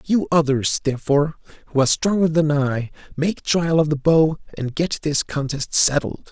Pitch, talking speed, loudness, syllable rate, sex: 150 Hz, 170 wpm, -20 LUFS, 5.0 syllables/s, male